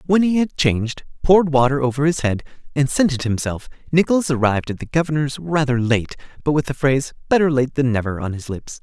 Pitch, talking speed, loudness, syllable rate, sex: 140 Hz, 205 wpm, -19 LUFS, 6.2 syllables/s, male